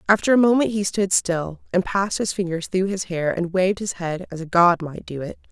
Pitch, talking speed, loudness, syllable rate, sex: 185 Hz, 250 wpm, -21 LUFS, 5.5 syllables/s, female